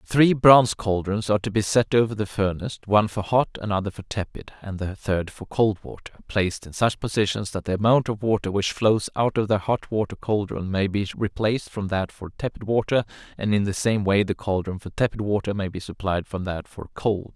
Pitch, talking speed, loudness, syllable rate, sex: 105 Hz, 220 wpm, -23 LUFS, 5.6 syllables/s, male